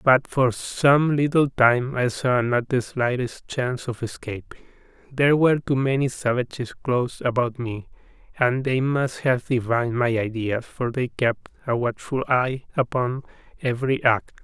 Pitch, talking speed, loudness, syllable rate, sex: 125 Hz, 155 wpm, -23 LUFS, 4.5 syllables/s, male